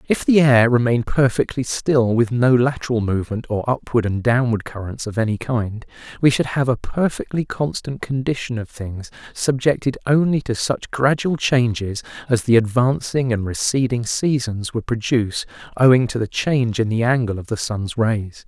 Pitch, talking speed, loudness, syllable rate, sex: 120 Hz, 170 wpm, -19 LUFS, 4.9 syllables/s, male